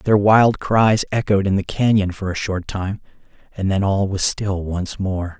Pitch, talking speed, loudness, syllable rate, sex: 100 Hz, 200 wpm, -19 LUFS, 4.2 syllables/s, male